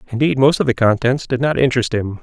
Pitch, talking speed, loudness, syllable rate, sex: 130 Hz, 245 wpm, -16 LUFS, 6.5 syllables/s, male